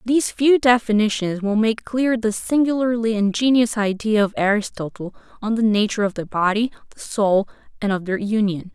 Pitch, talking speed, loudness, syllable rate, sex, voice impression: 220 Hz, 165 wpm, -20 LUFS, 5.3 syllables/s, female, very feminine, adult-like, slightly tensed, slightly clear, slightly cute, slightly sweet